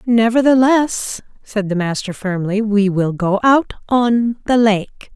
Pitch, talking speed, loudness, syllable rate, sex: 220 Hz, 140 wpm, -16 LUFS, 3.7 syllables/s, female